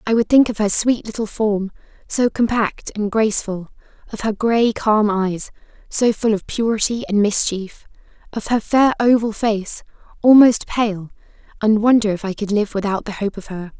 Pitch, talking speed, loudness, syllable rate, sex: 215 Hz, 180 wpm, -18 LUFS, 4.7 syllables/s, female